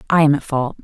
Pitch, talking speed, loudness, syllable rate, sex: 145 Hz, 290 wpm, -17 LUFS, 6.8 syllables/s, female